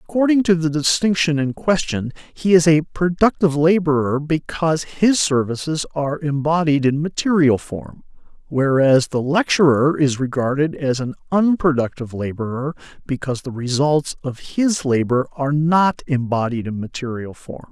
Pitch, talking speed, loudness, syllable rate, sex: 145 Hz, 135 wpm, -19 LUFS, 4.9 syllables/s, male